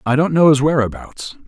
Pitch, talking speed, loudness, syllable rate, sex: 145 Hz, 205 wpm, -15 LUFS, 5.4 syllables/s, male